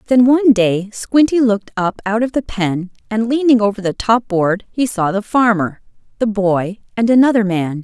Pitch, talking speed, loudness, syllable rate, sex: 215 Hz, 190 wpm, -16 LUFS, 4.9 syllables/s, female